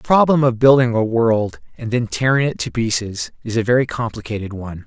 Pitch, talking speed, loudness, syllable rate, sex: 120 Hz, 210 wpm, -18 LUFS, 5.7 syllables/s, male